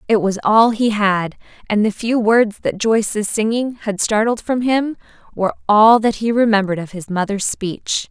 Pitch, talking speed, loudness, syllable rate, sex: 215 Hz, 185 wpm, -17 LUFS, 4.6 syllables/s, female